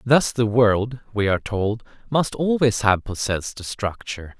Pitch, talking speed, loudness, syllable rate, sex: 110 Hz, 165 wpm, -22 LUFS, 4.6 syllables/s, male